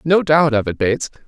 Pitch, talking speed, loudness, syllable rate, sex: 140 Hz, 235 wpm, -16 LUFS, 5.8 syllables/s, male